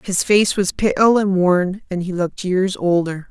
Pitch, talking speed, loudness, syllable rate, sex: 185 Hz, 200 wpm, -17 LUFS, 4.1 syllables/s, female